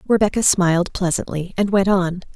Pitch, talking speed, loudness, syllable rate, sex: 185 Hz, 155 wpm, -18 LUFS, 5.2 syllables/s, female